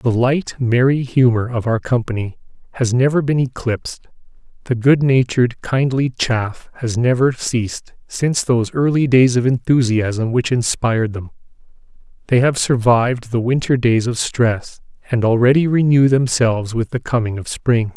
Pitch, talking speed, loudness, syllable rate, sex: 125 Hz, 145 wpm, -17 LUFS, 4.8 syllables/s, male